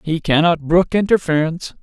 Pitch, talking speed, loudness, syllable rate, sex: 165 Hz, 130 wpm, -16 LUFS, 5.3 syllables/s, male